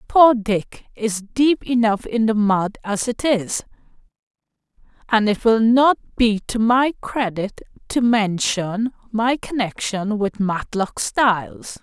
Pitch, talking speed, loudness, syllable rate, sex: 220 Hz, 130 wpm, -19 LUFS, 3.6 syllables/s, female